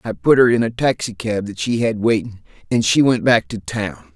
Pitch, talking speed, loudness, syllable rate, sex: 110 Hz, 230 wpm, -18 LUFS, 5.3 syllables/s, male